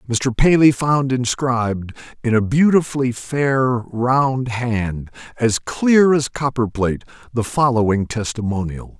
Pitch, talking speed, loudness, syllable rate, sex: 125 Hz, 115 wpm, -18 LUFS, 3.9 syllables/s, male